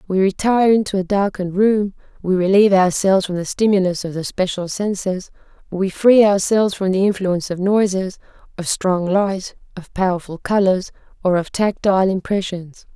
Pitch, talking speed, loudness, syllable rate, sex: 190 Hz, 155 wpm, -18 LUFS, 5.3 syllables/s, female